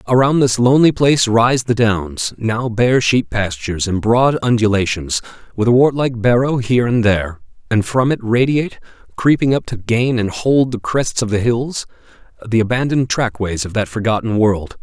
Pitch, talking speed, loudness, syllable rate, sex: 115 Hz, 180 wpm, -16 LUFS, 5.0 syllables/s, male